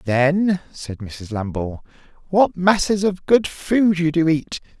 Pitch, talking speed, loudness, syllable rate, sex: 160 Hz, 150 wpm, -19 LUFS, 3.8 syllables/s, male